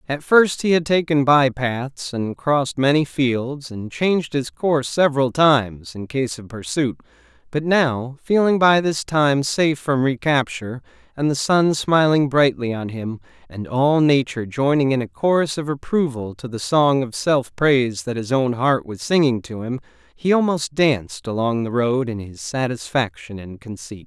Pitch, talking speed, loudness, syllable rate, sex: 135 Hz, 175 wpm, -19 LUFS, 4.6 syllables/s, male